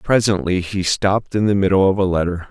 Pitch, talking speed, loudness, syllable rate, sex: 95 Hz, 215 wpm, -17 LUFS, 5.8 syllables/s, male